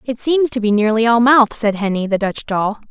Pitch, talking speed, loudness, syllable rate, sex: 225 Hz, 250 wpm, -15 LUFS, 5.1 syllables/s, female